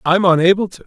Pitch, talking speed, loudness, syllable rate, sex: 180 Hz, 210 wpm, -14 LUFS, 6.6 syllables/s, male